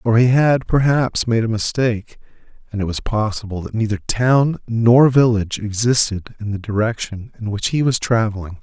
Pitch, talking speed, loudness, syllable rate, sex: 115 Hz, 175 wpm, -18 LUFS, 5.0 syllables/s, male